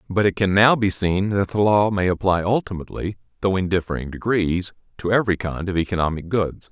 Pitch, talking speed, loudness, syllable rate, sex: 95 Hz, 195 wpm, -21 LUFS, 5.8 syllables/s, male